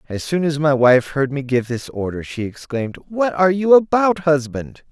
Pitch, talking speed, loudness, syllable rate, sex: 150 Hz, 210 wpm, -18 LUFS, 5.0 syllables/s, male